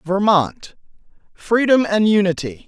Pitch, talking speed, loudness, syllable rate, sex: 195 Hz, 65 wpm, -17 LUFS, 4.0 syllables/s, male